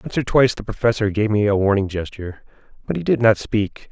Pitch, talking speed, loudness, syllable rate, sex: 105 Hz, 230 wpm, -19 LUFS, 6.1 syllables/s, male